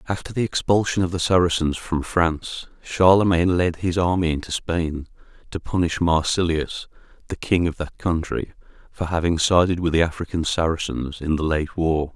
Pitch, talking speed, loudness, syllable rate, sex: 85 Hz, 165 wpm, -21 LUFS, 5.1 syllables/s, male